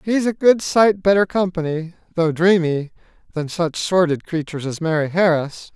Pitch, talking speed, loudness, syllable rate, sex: 175 Hz, 155 wpm, -19 LUFS, 4.6 syllables/s, male